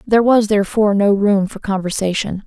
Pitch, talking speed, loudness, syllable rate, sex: 205 Hz, 170 wpm, -16 LUFS, 6.0 syllables/s, female